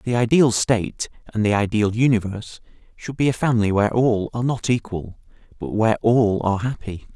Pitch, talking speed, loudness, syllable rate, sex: 110 Hz, 175 wpm, -20 LUFS, 5.7 syllables/s, male